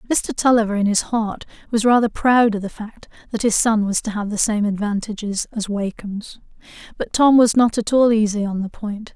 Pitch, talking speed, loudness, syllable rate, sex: 215 Hz, 210 wpm, -19 LUFS, 5.1 syllables/s, female